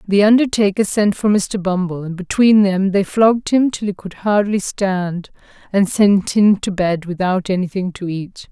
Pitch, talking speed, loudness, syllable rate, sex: 195 Hz, 185 wpm, -16 LUFS, 4.5 syllables/s, female